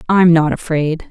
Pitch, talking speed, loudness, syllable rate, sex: 165 Hz, 160 wpm, -14 LUFS, 4.4 syllables/s, female